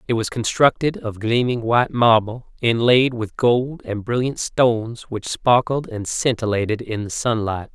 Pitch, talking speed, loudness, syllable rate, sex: 115 Hz, 155 wpm, -20 LUFS, 4.4 syllables/s, male